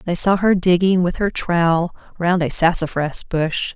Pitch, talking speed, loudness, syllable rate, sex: 175 Hz, 175 wpm, -18 LUFS, 4.5 syllables/s, female